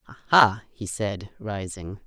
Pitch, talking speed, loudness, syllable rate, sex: 105 Hz, 115 wpm, -24 LUFS, 3.4 syllables/s, female